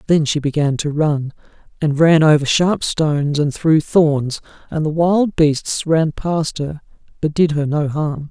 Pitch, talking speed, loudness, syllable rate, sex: 155 Hz, 180 wpm, -17 LUFS, 4.0 syllables/s, male